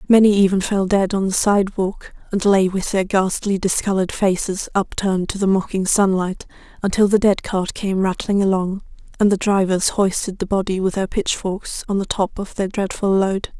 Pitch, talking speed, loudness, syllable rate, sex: 195 Hz, 185 wpm, -19 LUFS, 5.1 syllables/s, female